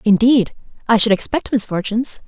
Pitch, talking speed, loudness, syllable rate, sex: 225 Hz, 130 wpm, -16 LUFS, 5.5 syllables/s, female